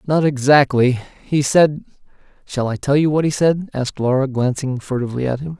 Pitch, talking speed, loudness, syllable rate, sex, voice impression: 140 Hz, 170 wpm, -18 LUFS, 5.5 syllables/s, male, very masculine, adult-like, slightly thick, slightly relaxed, powerful, bright, slightly soft, clear, fluent, slightly raspy, cool, very intellectual, refreshing, very sincere, calm, slightly mature, very friendly, very reassuring, slightly unique, elegant, slightly wild, sweet, lively, kind, slightly intense, modest